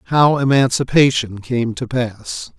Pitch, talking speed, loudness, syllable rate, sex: 125 Hz, 115 wpm, -17 LUFS, 3.9 syllables/s, male